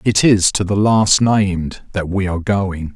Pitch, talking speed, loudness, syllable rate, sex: 95 Hz, 205 wpm, -16 LUFS, 4.3 syllables/s, male